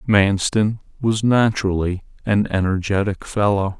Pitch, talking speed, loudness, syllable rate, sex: 100 Hz, 95 wpm, -19 LUFS, 4.4 syllables/s, male